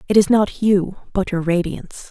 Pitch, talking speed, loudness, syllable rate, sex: 195 Hz, 200 wpm, -18 LUFS, 5.0 syllables/s, female